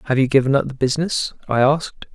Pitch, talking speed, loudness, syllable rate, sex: 135 Hz, 225 wpm, -19 LUFS, 6.7 syllables/s, male